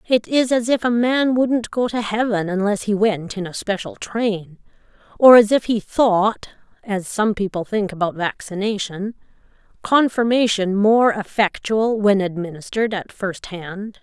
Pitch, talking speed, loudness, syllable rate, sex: 210 Hz, 155 wpm, -19 LUFS, 3.7 syllables/s, female